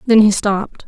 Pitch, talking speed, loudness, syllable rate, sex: 210 Hz, 205 wpm, -15 LUFS, 5.3 syllables/s, female